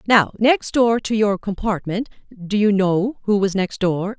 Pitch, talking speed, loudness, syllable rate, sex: 205 Hz, 170 wpm, -19 LUFS, 4.1 syllables/s, female